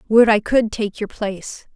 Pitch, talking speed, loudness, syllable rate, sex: 215 Hz, 205 wpm, -18 LUFS, 4.7 syllables/s, female